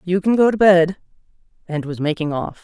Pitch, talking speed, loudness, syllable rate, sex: 175 Hz, 205 wpm, -17 LUFS, 5.4 syllables/s, female